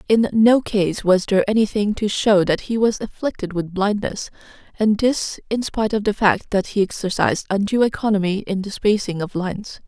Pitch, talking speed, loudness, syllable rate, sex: 205 Hz, 190 wpm, -19 LUFS, 5.2 syllables/s, female